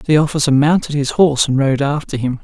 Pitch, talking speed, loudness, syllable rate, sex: 145 Hz, 220 wpm, -15 LUFS, 5.9 syllables/s, male